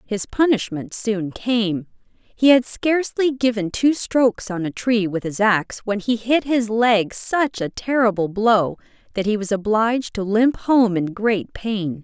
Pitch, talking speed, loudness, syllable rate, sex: 220 Hz, 175 wpm, -20 LUFS, 4.2 syllables/s, female